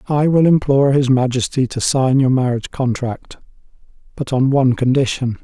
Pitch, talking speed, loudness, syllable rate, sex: 130 Hz, 155 wpm, -16 LUFS, 5.4 syllables/s, male